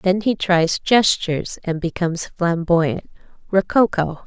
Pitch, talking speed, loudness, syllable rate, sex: 180 Hz, 110 wpm, -19 LUFS, 4.0 syllables/s, female